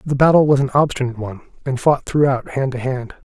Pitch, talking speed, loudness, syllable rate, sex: 135 Hz, 220 wpm, -17 LUFS, 6.3 syllables/s, male